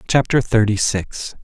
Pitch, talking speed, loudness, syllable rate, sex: 110 Hz, 125 wpm, -18 LUFS, 4.1 syllables/s, male